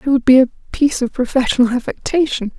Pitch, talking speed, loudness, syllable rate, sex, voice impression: 260 Hz, 185 wpm, -16 LUFS, 6.6 syllables/s, female, feminine, adult-like, relaxed, powerful, soft, muffled, slightly raspy, intellectual, slightly calm, slightly reassuring, slightly strict, modest